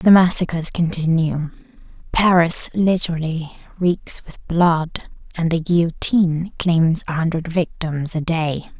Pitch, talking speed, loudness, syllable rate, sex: 165 Hz, 115 wpm, -19 LUFS, 4.0 syllables/s, female